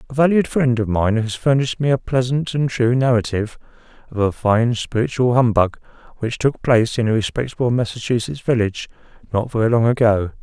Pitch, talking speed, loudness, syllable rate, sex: 120 Hz, 175 wpm, -18 LUFS, 5.8 syllables/s, male